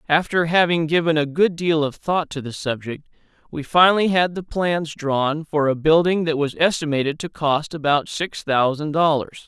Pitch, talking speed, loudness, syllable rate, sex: 155 Hz, 185 wpm, -20 LUFS, 4.7 syllables/s, male